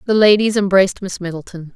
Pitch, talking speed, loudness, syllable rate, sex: 190 Hz, 170 wpm, -15 LUFS, 6.3 syllables/s, female